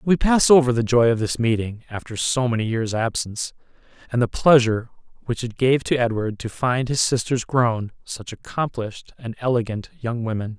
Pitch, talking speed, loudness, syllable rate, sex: 120 Hz, 180 wpm, -21 LUFS, 5.2 syllables/s, male